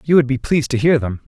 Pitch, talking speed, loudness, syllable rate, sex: 135 Hz, 315 wpm, -17 LUFS, 7.0 syllables/s, male